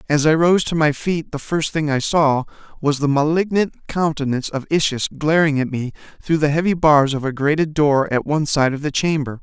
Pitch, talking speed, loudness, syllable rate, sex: 150 Hz, 215 wpm, -18 LUFS, 5.4 syllables/s, male